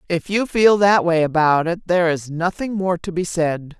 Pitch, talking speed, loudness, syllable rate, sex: 175 Hz, 220 wpm, -18 LUFS, 4.8 syllables/s, female